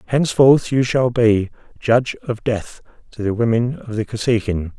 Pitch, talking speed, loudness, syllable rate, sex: 115 Hz, 165 wpm, -18 LUFS, 4.7 syllables/s, male